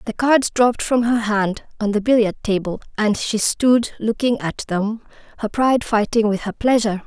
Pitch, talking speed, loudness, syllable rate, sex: 220 Hz, 185 wpm, -19 LUFS, 4.9 syllables/s, female